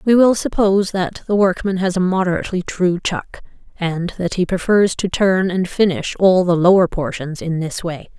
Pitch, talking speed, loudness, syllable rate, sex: 185 Hz, 190 wpm, -17 LUFS, 4.9 syllables/s, female